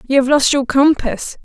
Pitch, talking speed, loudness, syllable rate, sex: 270 Hz, 210 wpm, -14 LUFS, 4.9 syllables/s, female